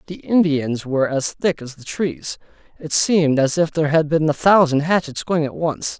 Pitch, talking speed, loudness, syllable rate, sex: 155 Hz, 210 wpm, -18 LUFS, 5.0 syllables/s, male